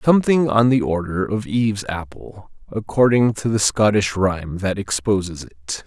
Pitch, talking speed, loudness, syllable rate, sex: 105 Hz, 155 wpm, -19 LUFS, 4.7 syllables/s, male